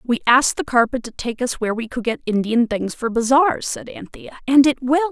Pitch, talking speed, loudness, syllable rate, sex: 245 Hz, 235 wpm, -19 LUFS, 5.4 syllables/s, female